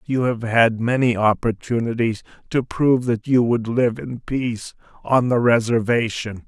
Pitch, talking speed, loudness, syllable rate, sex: 120 Hz, 150 wpm, -20 LUFS, 4.5 syllables/s, male